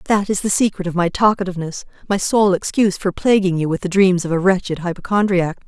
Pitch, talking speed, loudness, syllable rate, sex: 185 Hz, 210 wpm, -18 LUFS, 6.2 syllables/s, female